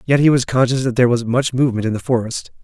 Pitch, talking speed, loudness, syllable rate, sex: 125 Hz, 275 wpm, -17 LUFS, 7.0 syllables/s, male